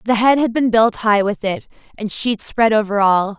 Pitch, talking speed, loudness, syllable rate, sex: 220 Hz, 230 wpm, -16 LUFS, 4.8 syllables/s, female